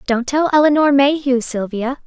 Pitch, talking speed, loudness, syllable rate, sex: 270 Hz, 145 wpm, -16 LUFS, 4.8 syllables/s, female